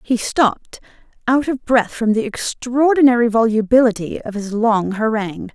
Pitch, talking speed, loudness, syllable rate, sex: 230 Hz, 140 wpm, -17 LUFS, 4.8 syllables/s, female